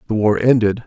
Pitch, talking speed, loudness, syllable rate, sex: 110 Hz, 210 wpm, -16 LUFS, 5.8 syllables/s, male